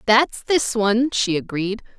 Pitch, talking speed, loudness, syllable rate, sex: 225 Hz, 150 wpm, -20 LUFS, 4.1 syllables/s, female